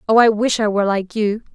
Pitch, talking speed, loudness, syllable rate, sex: 215 Hz, 235 wpm, -17 LUFS, 5.4 syllables/s, female